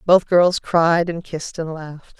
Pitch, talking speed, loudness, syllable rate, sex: 170 Hz, 190 wpm, -18 LUFS, 4.4 syllables/s, female